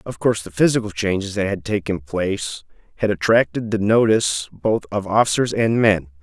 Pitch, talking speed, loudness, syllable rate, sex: 100 Hz, 175 wpm, -20 LUFS, 5.5 syllables/s, male